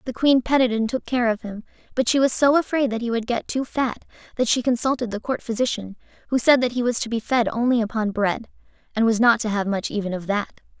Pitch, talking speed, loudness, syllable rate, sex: 235 Hz, 250 wpm, -22 LUFS, 6.0 syllables/s, female